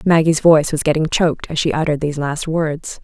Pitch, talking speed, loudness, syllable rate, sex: 155 Hz, 220 wpm, -17 LUFS, 6.3 syllables/s, female